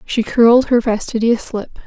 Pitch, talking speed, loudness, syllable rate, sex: 230 Hz, 160 wpm, -15 LUFS, 5.0 syllables/s, female